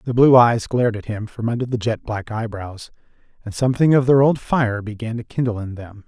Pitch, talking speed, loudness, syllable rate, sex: 115 Hz, 225 wpm, -19 LUFS, 5.6 syllables/s, male